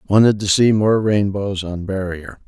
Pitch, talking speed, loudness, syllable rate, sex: 100 Hz, 170 wpm, -17 LUFS, 4.5 syllables/s, male